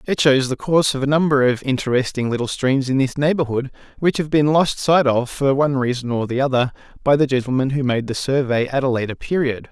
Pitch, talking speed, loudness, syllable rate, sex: 135 Hz, 230 wpm, -19 LUFS, 5.9 syllables/s, male